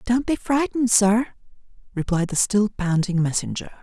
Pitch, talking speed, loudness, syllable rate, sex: 215 Hz, 140 wpm, -21 LUFS, 5.1 syllables/s, male